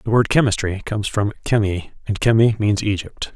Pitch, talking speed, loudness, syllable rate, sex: 105 Hz, 180 wpm, -19 LUFS, 5.5 syllables/s, male